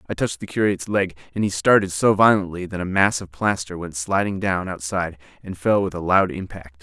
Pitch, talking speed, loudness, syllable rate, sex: 90 Hz, 220 wpm, -21 LUFS, 5.8 syllables/s, male